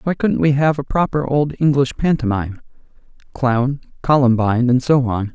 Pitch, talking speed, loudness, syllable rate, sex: 135 Hz, 145 wpm, -17 LUFS, 5.1 syllables/s, male